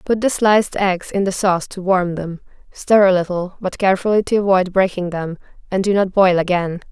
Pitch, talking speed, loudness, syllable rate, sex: 190 Hz, 210 wpm, -17 LUFS, 5.4 syllables/s, female